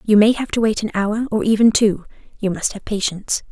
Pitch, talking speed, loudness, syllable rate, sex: 210 Hz, 240 wpm, -18 LUFS, 5.7 syllables/s, female